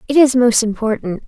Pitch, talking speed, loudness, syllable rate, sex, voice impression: 240 Hz, 190 wpm, -15 LUFS, 5.6 syllables/s, female, very feminine, young, cute, refreshing, kind